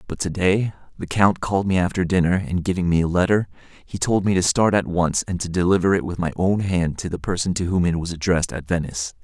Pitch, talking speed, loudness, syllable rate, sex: 90 Hz, 255 wpm, -21 LUFS, 6.0 syllables/s, male